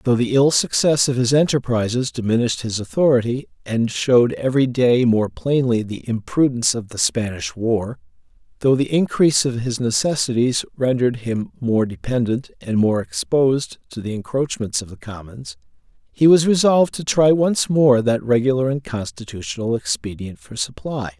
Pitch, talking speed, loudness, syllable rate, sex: 125 Hz, 155 wpm, -19 LUFS, 5.1 syllables/s, male